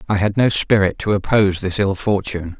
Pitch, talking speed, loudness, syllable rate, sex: 100 Hz, 210 wpm, -18 LUFS, 5.8 syllables/s, male